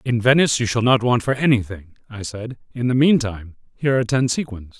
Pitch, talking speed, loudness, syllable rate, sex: 120 Hz, 225 wpm, -19 LUFS, 6.0 syllables/s, male